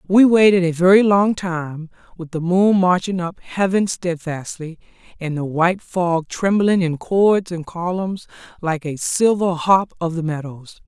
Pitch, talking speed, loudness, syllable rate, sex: 175 Hz, 160 wpm, -18 LUFS, 4.2 syllables/s, female